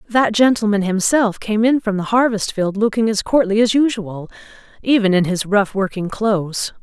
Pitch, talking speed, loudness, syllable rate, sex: 210 Hz, 175 wpm, -17 LUFS, 5.0 syllables/s, female